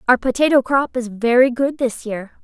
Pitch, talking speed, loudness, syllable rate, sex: 250 Hz, 195 wpm, -18 LUFS, 5.1 syllables/s, female